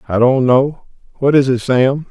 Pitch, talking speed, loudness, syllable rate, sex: 130 Hz, 170 wpm, -14 LUFS, 4.4 syllables/s, male